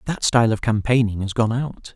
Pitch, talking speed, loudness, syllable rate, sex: 115 Hz, 215 wpm, -20 LUFS, 5.5 syllables/s, male